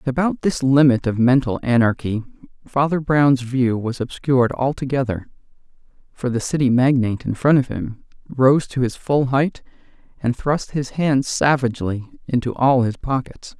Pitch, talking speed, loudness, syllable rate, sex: 130 Hz, 155 wpm, -19 LUFS, 4.7 syllables/s, male